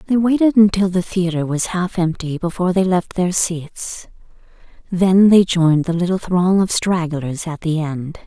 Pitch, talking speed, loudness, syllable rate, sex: 180 Hz, 175 wpm, -17 LUFS, 4.6 syllables/s, female